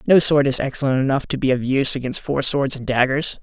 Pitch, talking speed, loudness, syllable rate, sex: 135 Hz, 245 wpm, -19 LUFS, 6.1 syllables/s, male